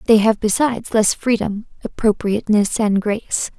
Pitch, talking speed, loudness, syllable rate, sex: 220 Hz, 135 wpm, -18 LUFS, 5.0 syllables/s, female